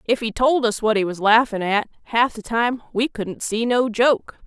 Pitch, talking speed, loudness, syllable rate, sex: 230 Hz, 230 wpm, -20 LUFS, 4.5 syllables/s, female